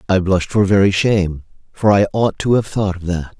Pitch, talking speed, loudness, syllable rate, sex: 95 Hz, 230 wpm, -16 LUFS, 5.6 syllables/s, male